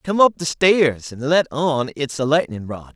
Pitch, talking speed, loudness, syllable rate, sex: 145 Hz, 225 wpm, -19 LUFS, 4.3 syllables/s, male